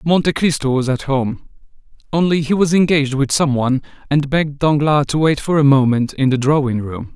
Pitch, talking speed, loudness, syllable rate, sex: 145 Hz, 200 wpm, -16 LUFS, 5.5 syllables/s, male